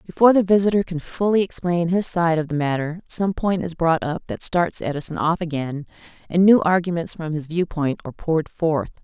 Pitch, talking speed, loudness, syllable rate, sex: 170 Hz, 200 wpm, -21 LUFS, 5.5 syllables/s, female